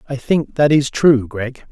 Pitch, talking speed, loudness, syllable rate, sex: 135 Hz, 210 wpm, -16 LUFS, 4.0 syllables/s, male